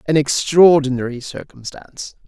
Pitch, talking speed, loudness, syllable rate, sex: 145 Hz, 80 wpm, -15 LUFS, 4.8 syllables/s, male